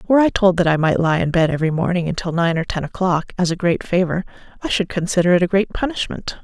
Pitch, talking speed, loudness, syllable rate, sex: 180 Hz, 250 wpm, -18 LUFS, 6.6 syllables/s, female